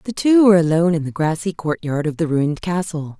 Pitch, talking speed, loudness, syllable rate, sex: 170 Hz, 225 wpm, -18 LUFS, 6.2 syllables/s, female